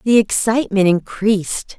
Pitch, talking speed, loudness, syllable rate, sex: 205 Hz, 100 wpm, -17 LUFS, 4.8 syllables/s, female